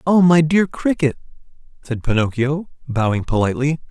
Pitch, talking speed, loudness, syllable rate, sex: 140 Hz, 125 wpm, -18 LUFS, 5.3 syllables/s, male